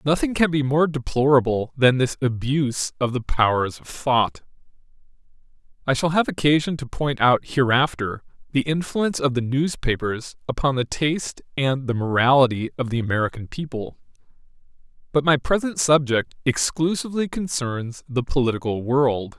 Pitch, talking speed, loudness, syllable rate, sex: 135 Hz, 140 wpm, -22 LUFS, 5.0 syllables/s, male